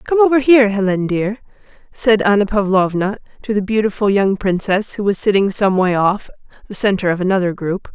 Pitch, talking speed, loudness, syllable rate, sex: 205 Hz, 180 wpm, -16 LUFS, 5.7 syllables/s, female